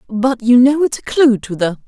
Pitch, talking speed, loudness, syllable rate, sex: 245 Hz, 255 wpm, -14 LUFS, 4.9 syllables/s, female